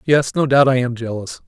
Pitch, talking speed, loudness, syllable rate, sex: 130 Hz, 245 wpm, -17 LUFS, 5.3 syllables/s, male